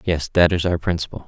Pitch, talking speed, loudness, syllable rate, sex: 85 Hz, 235 wpm, -20 LUFS, 6.0 syllables/s, male